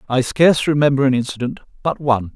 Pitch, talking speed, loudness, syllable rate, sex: 135 Hz, 180 wpm, -17 LUFS, 6.7 syllables/s, male